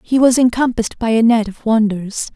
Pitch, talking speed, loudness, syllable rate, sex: 230 Hz, 205 wpm, -15 LUFS, 5.4 syllables/s, female